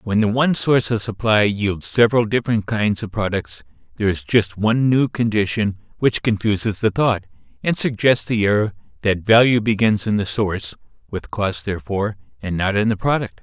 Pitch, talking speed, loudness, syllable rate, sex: 105 Hz, 180 wpm, -19 LUFS, 5.2 syllables/s, male